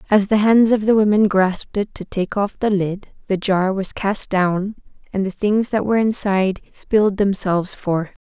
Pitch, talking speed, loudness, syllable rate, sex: 200 Hz, 195 wpm, -18 LUFS, 4.8 syllables/s, female